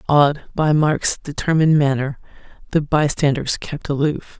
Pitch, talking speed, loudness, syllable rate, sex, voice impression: 145 Hz, 125 wpm, -19 LUFS, 4.4 syllables/s, female, feminine, adult-like, slightly cool, intellectual